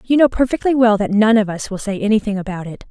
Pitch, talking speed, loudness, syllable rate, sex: 215 Hz, 270 wpm, -16 LUFS, 6.4 syllables/s, female